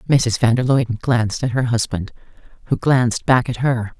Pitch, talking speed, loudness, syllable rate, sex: 120 Hz, 195 wpm, -18 LUFS, 5.3 syllables/s, female